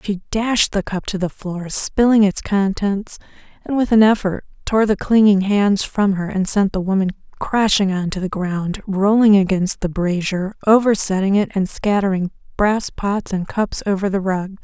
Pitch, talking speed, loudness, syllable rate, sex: 200 Hz, 180 wpm, -18 LUFS, 4.5 syllables/s, female